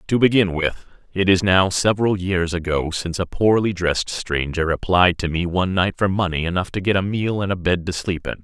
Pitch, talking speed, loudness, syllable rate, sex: 90 Hz, 230 wpm, -20 LUFS, 5.6 syllables/s, male